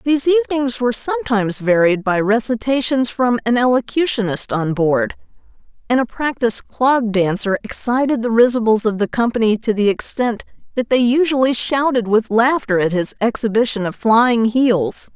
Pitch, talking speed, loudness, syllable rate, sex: 230 Hz, 150 wpm, -17 LUFS, 5.1 syllables/s, female